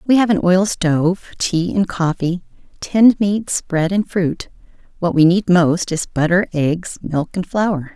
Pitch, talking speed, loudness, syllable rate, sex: 180 Hz, 175 wpm, -17 LUFS, 4.1 syllables/s, female